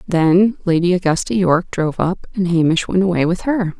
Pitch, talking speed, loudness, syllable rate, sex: 180 Hz, 190 wpm, -17 LUFS, 5.5 syllables/s, female